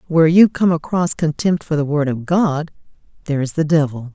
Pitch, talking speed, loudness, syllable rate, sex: 155 Hz, 200 wpm, -17 LUFS, 5.6 syllables/s, female